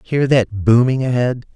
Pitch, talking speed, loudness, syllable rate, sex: 125 Hz, 155 wpm, -16 LUFS, 4.3 syllables/s, male